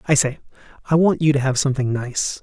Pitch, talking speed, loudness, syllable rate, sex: 140 Hz, 225 wpm, -19 LUFS, 6.0 syllables/s, male